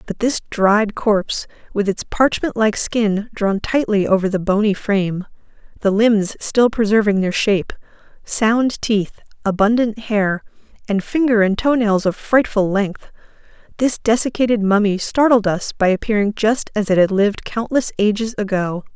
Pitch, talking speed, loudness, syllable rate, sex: 210 Hz, 150 wpm, -18 LUFS, 4.5 syllables/s, female